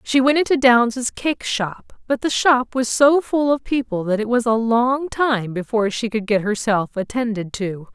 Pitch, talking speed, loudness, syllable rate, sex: 235 Hz, 205 wpm, -19 LUFS, 4.6 syllables/s, female